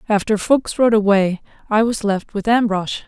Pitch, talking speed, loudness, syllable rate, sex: 215 Hz, 175 wpm, -17 LUFS, 4.6 syllables/s, female